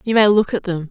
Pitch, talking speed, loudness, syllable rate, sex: 195 Hz, 330 wpm, -16 LUFS, 6.2 syllables/s, female